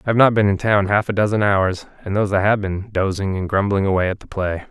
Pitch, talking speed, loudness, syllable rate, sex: 100 Hz, 280 wpm, -19 LUFS, 6.2 syllables/s, male